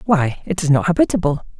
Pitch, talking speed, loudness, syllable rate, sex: 175 Hz, 190 wpm, -18 LUFS, 6.1 syllables/s, female